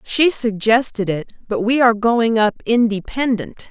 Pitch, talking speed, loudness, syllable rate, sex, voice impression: 225 Hz, 145 wpm, -17 LUFS, 4.5 syllables/s, female, feminine, adult-like, slightly clear, slightly sincere, slightly friendly, slightly reassuring